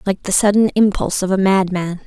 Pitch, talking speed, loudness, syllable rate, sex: 195 Hz, 205 wpm, -16 LUFS, 5.8 syllables/s, female